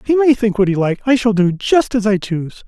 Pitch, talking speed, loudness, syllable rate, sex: 215 Hz, 270 wpm, -15 LUFS, 6.0 syllables/s, male